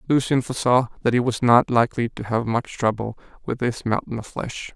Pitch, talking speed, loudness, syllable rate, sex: 120 Hz, 200 wpm, -22 LUFS, 5.5 syllables/s, male